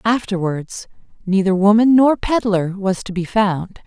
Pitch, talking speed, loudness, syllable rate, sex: 200 Hz, 140 wpm, -17 LUFS, 4.2 syllables/s, female